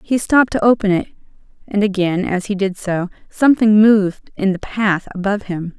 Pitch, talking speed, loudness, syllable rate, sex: 200 Hz, 185 wpm, -16 LUFS, 5.4 syllables/s, female